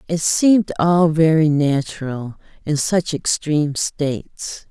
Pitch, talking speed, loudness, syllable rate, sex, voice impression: 155 Hz, 115 wpm, -18 LUFS, 3.8 syllables/s, female, feminine, middle-aged, slightly tensed, powerful, halting, slightly raspy, intellectual, calm, slightly friendly, elegant, lively, slightly strict, slightly sharp